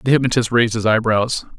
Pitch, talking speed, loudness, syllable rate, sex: 115 Hz, 190 wpm, -17 LUFS, 6.6 syllables/s, male